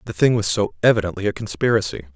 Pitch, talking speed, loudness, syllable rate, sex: 100 Hz, 195 wpm, -20 LUFS, 7.3 syllables/s, male